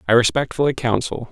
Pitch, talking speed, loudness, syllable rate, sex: 125 Hz, 135 wpm, -19 LUFS, 6.1 syllables/s, male